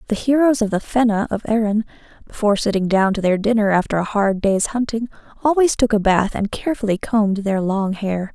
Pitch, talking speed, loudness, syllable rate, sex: 210 Hz, 200 wpm, -19 LUFS, 5.7 syllables/s, female